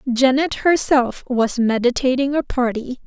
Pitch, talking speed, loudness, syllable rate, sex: 255 Hz, 115 wpm, -18 LUFS, 4.2 syllables/s, female